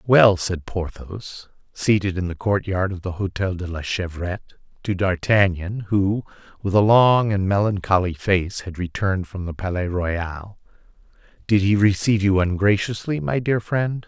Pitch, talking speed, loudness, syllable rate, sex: 95 Hz, 155 wpm, -21 LUFS, 4.5 syllables/s, male